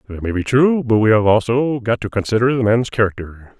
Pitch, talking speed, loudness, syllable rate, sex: 115 Hz, 235 wpm, -16 LUFS, 5.6 syllables/s, male